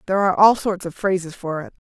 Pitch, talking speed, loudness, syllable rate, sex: 185 Hz, 255 wpm, -20 LUFS, 6.9 syllables/s, female